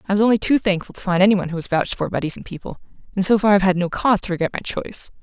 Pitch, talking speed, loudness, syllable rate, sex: 195 Hz, 300 wpm, -19 LUFS, 8.1 syllables/s, female